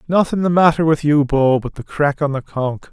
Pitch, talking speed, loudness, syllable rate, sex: 150 Hz, 245 wpm, -16 LUFS, 5.1 syllables/s, male